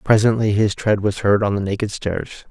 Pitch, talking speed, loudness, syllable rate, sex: 105 Hz, 215 wpm, -19 LUFS, 5.1 syllables/s, male